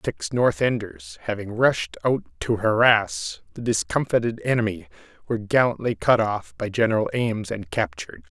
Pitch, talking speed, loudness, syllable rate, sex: 115 Hz, 145 wpm, -23 LUFS, 4.8 syllables/s, male